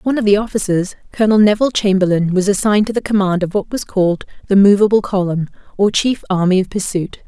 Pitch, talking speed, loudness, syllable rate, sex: 200 Hz, 200 wpm, -15 LUFS, 6.5 syllables/s, female